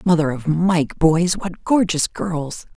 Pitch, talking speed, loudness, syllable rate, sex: 170 Hz, 130 wpm, -19 LUFS, 3.5 syllables/s, female